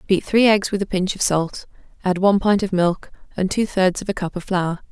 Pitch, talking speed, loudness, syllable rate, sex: 190 Hz, 255 wpm, -20 LUFS, 5.4 syllables/s, female